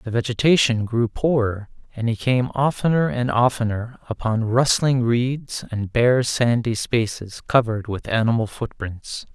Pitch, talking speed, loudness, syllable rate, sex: 120 Hz, 135 wpm, -21 LUFS, 4.3 syllables/s, male